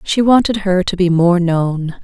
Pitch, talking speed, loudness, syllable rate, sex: 185 Hz, 205 wpm, -14 LUFS, 4.2 syllables/s, female